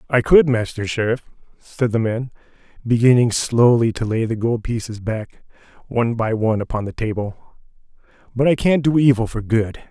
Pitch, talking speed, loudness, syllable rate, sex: 115 Hz, 170 wpm, -19 LUFS, 5.0 syllables/s, male